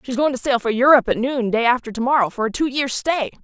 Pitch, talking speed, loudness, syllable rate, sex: 250 Hz, 295 wpm, -19 LUFS, 6.5 syllables/s, female